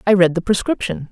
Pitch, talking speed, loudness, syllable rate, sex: 185 Hz, 215 wpm, -17 LUFS, 6.1 syllables/s, female